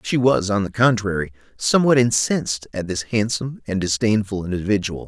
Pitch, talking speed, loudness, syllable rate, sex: 110 Hz, 155 wpm, -20 LUFS, 5.6 syllables/s, male